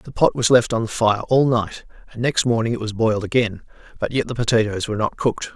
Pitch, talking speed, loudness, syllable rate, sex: 115 Hz, 250 wpm, -20 LUFS, 6.2 syllables/s, male